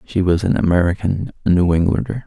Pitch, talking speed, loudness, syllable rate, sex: 90 Hz, 185 wpm, -17 LUFS, 5.9 syllables/s, male